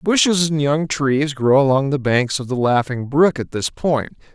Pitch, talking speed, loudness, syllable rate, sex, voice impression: 140 Hz, 205 wpm, -18 LUFS, 4.4 syllables/s, male, masculine, adult-like, tensed, slightly powerful, slightly bright, clear, fluent, intellectual, friendly, unique, lively, slightly strict